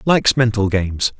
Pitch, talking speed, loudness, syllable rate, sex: 110 Hz, 150 wpm, -17 LUFS, 5.8 syllables/s, male